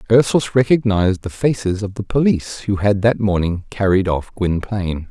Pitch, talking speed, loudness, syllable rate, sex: 105 Hz, 165 wpm, -18 LUFS, 5.2 syllables/s, male